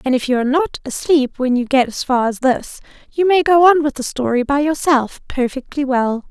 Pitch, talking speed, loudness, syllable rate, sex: 275 Hz, 230 wpm, -16 LUFS, 5.2 syllables/s, female